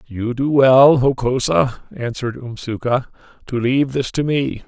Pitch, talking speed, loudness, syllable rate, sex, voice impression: 125 Hz, 140 wpm, -17 LUFS, 4.4 syllables/s, male, masculine, adult-like, slightly thick, cool, sincere, slightly friendly, slightly reassuring